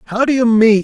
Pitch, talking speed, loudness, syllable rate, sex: 225 Hz, 290 wpm, -13 LUFS, 6.1 syllables/s, male